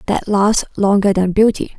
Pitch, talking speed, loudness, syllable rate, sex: 200 Hz, 170 wpm, -15 LUFS, 4.6 syllables/s, female